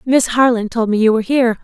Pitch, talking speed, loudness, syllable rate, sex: 235 Hz, 260 wpm, -15 LUFS, 6.7 syllables/s, female